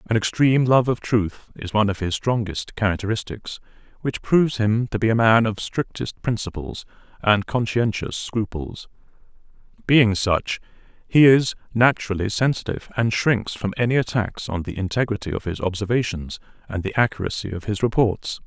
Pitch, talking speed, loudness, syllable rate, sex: 110 Hz, 155 wpm, -22 LUFS, 5.2 syllables/s, male